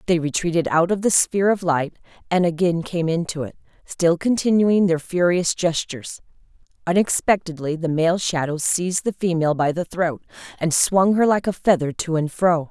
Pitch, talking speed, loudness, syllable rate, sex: 170 Hz, 175 wpm, -20 LUFS, 5.1 syllables/s, female